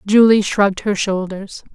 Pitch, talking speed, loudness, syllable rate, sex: 200 Hz, 140 wpm, -16 LUFS, 4.6 syllables/s, female